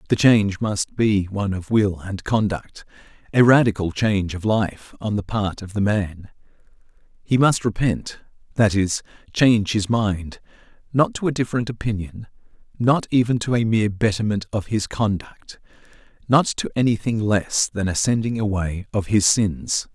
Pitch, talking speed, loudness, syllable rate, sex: 105 Hz, 145 wpm, -21 LUFS, 4.7 syllables/s, male